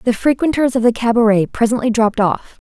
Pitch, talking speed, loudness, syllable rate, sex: 235 Hz, 180 wpm, -15 LUFS, 6.1 syllables/s, female